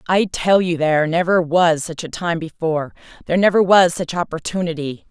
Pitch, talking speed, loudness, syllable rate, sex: 170 Hz, 175 wpm, -18 LUFS, 5.5 syllables/s, female